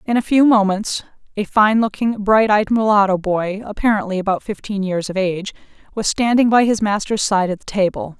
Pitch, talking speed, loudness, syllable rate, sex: 205 Hz, 190 wpm, -17 LUFS, 5.3 syllables/s, female